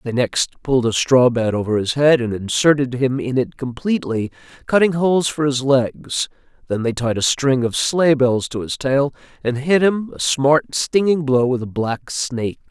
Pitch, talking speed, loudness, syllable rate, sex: 135 Hz, 200 wpm, -18 LUFS, 4.7 syllables/s, male